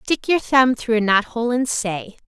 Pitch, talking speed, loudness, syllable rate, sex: 235 Hz, 210 wpm, -19 LUFS, 4.7 syllables/s, female